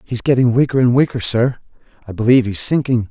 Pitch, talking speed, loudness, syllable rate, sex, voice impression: 120 Hz, 195 wpm, -15 LUFS, 6.3 syllables/s, male, very masculine, very adult-like, very middle-aged, very thick, tensed, very powerful, slightly dark, slightly hard, slightly muffled, fluent, very cool, intellectual, very sincere, very calm, mature, very friendly, very reassuring, unique, slightly elegant, wild, slightly sweet, slightly lively, kind